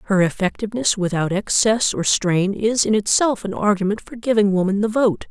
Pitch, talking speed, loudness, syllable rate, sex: 205 Hz, 180 wpm, -19 LUFS, 5.3 syllables/s, female